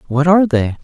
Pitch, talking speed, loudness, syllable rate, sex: 155 Hz, 215 wpm, -13 LUFS, 6.6 syllables/s, male